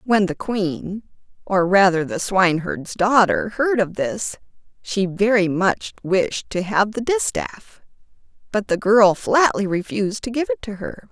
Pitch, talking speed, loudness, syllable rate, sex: 210 Hz, 145 wpm, -20 LUFS, 4.1 syllables/s, female